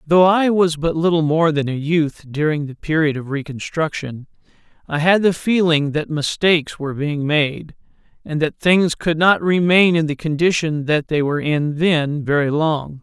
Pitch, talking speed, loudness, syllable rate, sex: 155 Hz, 180 wpm, -18 LUFS, 4.6 syllables/s, male